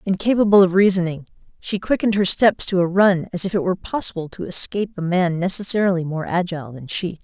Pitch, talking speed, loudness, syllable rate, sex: 185 Hz, 200 wpm, -19 LUFS, 6.2 syllables/s, female